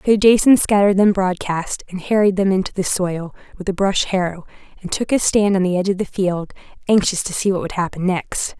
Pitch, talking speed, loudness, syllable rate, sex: 190 Hz, 225 wpm, -18 LUFS, 5.8 syllables/s, female